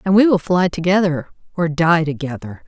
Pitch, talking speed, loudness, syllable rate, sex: 170 Hz, 180 wpm, -17 LUFS, 5.2 syllables/s, female